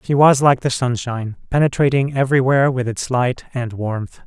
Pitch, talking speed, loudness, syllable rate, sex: 130 Hz, 170 wpm, -18 LUFS, 5.4 syllables/s, male